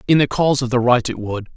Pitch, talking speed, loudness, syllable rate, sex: 125 Hz, 310 wpm, -18 LUFS, 6.8 syllables/s, male